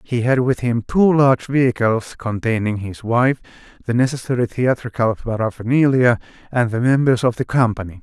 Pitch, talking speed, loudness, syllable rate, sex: 120 Hz, 150 wpm, -18 LUFS, 5.2 syllables/s, male